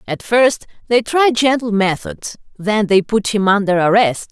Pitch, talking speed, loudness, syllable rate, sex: 215 Hz, 165 wpm, -15 LUFS, 4.2 syllables/s, female